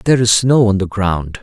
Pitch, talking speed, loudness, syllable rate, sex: 105 Hz, 250 wpm, -14 LUFS, 5.1 syllables/s, male